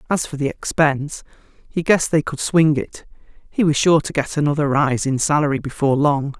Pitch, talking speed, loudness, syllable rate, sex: 150 Hz, 195 wpm, -19 LUFS, 5.5 syllables/s, female